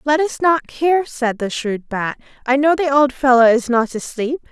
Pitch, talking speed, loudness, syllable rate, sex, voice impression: 265 Hz, 215 wpm, -17 LUFS, 4.8 syllables/s, female, very feminine, very young, slightly adult-like, thin, tensed, slightly powerful, very bright, slightly soft, slightly muffled, very fluent, slightly cute, intellectual, refreshing, slightly sincere, slightly calm, slightly unique, lively, kind, slightly modest